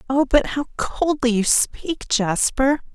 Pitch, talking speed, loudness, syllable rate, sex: 260 Hz, 140 wpm, -20 LUFS, 3.5 syllables/s, female